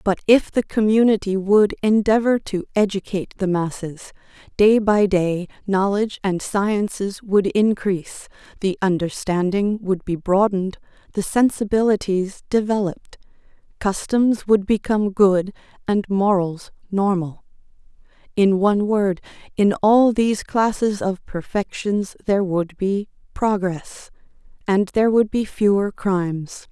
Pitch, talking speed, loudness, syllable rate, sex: 200 Hz, 115 wpm, -20 LUFS, 4.3 syllables/s, female